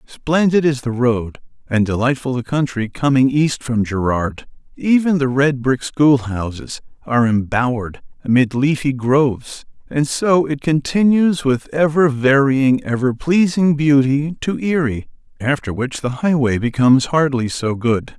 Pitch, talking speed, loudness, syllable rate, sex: 135 Hz, 140 wpm, -17 LUFS, 4.3 syllables/s, male